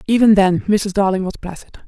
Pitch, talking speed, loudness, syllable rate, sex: 200 Hz, 190 wpm, -16 LUFS, 6.3 syllables/s, female